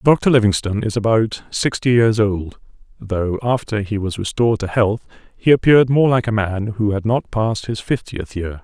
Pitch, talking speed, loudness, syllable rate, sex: 110 Hz, 190 wpm, -18 LUFS, 5.0 syllables/s, male